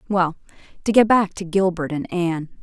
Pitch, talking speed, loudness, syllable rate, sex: 185 Hz, 185 wpm, -20 LUFS, 5.2 syllables/s, female